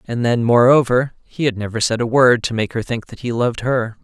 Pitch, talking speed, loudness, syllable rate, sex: 120 Hz, 255 wpm, -17 LUFS, 5.6 syllables/s, male